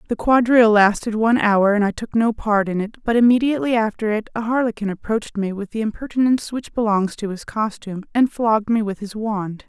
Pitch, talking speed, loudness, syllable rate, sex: 220 Hz, 210 wpm, -19 LUFS, 5.9 syllables/s, female